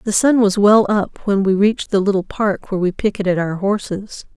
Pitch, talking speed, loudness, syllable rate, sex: 200 Hz, 220 wpm, -17 LUFS, 5.3 syllables/s, female